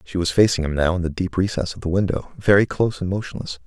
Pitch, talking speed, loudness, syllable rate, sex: 90 Hz, 260 wpm, -21 LUFS, 6.6 syllables/s, male